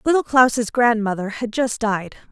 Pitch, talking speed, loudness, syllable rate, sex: 230 Hz, 155 wpm, -19 LUFS, 4.4 syllables/s, female